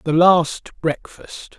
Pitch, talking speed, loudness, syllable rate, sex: 165 Hz, 115 wpm, -18 LUFS, 3.0 syllables/s, male